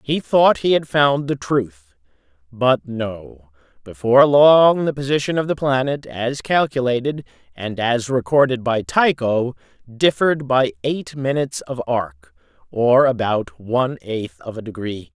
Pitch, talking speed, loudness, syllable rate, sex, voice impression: 130 Hz, 140 wpm, -18 LUFS, 4.1 syllables/s, male, masculine, adult-like, refreshing, slightly sincere, friendly, slightly lively